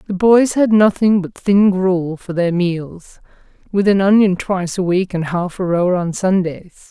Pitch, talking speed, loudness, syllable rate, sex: 185 Hz, 190 wpm, -16 LUFS, 4.2 syllables/s, female